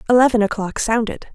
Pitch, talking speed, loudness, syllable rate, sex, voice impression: 225 Hz, 135 wpm, -18 LUFS, 6.3 syllables/s, female, feminine, slightly adult-like, clear, slightly fluent, slightly intellectual, slightly sharp